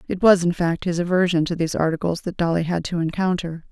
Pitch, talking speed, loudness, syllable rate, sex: 170 Hz, 225 wpm, -21 LUFS, 6.3 syllables/s, female